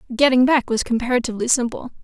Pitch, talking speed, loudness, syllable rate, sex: 245 Hz, 145 wpm, -19 LUFS, 7.4 syllables/s, female